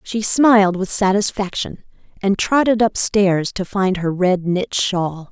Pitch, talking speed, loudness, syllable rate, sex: 195 Hz, 145 wpm, -17 LUFS, 3.9 syllables/s, female